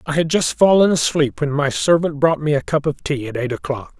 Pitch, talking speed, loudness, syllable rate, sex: 150 Hz, 255 wpm, -18 LUFS, 5.5 syllables/s, male